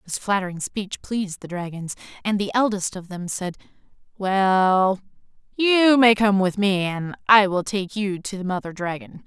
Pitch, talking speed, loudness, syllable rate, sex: 195 Hz, 175 wpm, -22 LUFS, 4.5 syllables/s, female